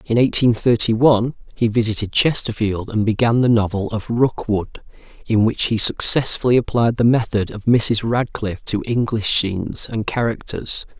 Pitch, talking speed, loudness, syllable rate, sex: 115 Hz, 155 wpm, -18 LUFS, 4.8 syllables/s, male